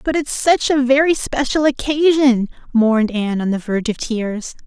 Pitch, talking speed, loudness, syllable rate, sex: 255 Hz, 180 wpm, -17 LUFS, 5.0 syllables/s, female